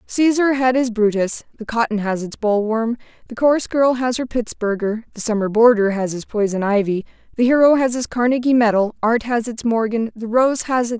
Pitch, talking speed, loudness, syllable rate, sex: 230 Hz, 190 wpm, -18 LUFS, 5.3 syllables/s, female